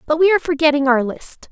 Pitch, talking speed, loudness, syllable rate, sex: 300 Hz, 240 wpm, -16 LUFS, 6.6 syllables/s, female